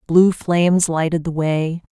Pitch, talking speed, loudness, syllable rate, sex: 165 Hz, 155 wpm, -18 LUFS, 4.1 syllables/s, female